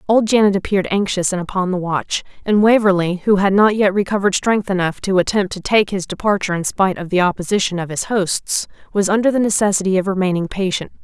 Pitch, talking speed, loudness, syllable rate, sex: 195 Hz, 205 wpm, -17 LUFS, 6.2 syllables/s, female